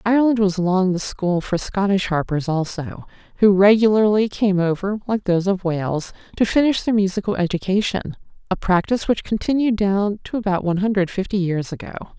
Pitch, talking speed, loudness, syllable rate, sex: 195 Hz, 160 wpm, -20 LUFS, 5.4 syllables/s, female